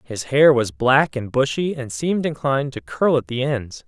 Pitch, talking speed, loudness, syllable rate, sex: 135 Hz, 215 wpm, -20 LUFS, 4.8 syllables/s, male